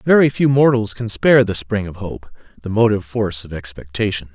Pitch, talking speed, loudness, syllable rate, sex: 110 Hz, 195 wpm, -17 LUFS, 5.9 syllables/s, male